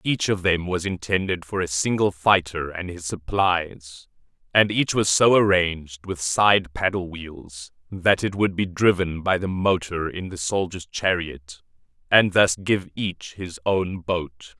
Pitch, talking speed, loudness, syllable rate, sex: 90 Hz, 165 wpm, -22 LUFS, 3.9 syllables/s, male